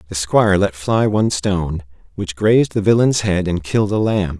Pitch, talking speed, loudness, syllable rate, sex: 95 Hz, 205 wpm, -17 LUFS, 5.5 syllables/s, male